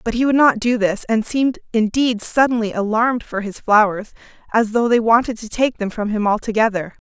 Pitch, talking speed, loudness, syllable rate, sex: 225 Hz, 205 wpm, -18 LUFS, 5.5 syllables/s, female